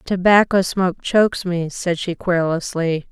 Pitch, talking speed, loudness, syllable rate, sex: 180 Hz, 135 wpm, -18 LUFS, 4.8 syllables/s, female